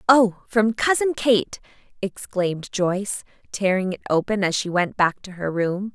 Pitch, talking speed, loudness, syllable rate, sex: 200 Hz, 160 wpm, -22 LUFS, 4.5 syllables/s, female